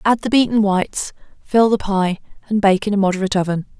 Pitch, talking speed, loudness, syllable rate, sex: 200 Hz, 205 wpm, -17 LUFS, 6.3 syllables/s, female